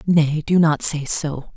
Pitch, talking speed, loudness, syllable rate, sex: 155 Hz, 190 wpm, -18 LUFS, 3.8 syllables/s, female